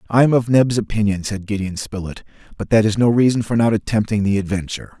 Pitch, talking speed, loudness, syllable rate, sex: 105 Hz, 215 wpm, -18 LUFS, 6.3 syllables/s, male